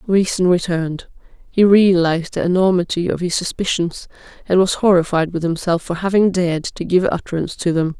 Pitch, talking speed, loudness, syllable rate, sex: 175 Hz, 165 wpm, -17 LUFS, 5.7 syllables/s, female